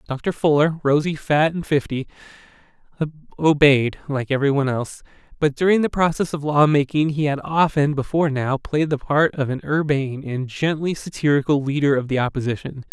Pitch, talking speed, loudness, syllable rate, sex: 145 Hz, 165 wpm, -20 LUFS, 5.3 syllables/s, male